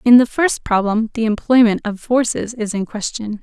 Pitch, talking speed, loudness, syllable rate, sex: 225 Hz, 195 wpm, -17 LUFS, 4.9 syllables/s, female